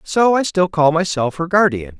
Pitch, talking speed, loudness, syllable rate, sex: 170 Hz, 210 wpm, -16 LUFS, 4.8 syllables/s, male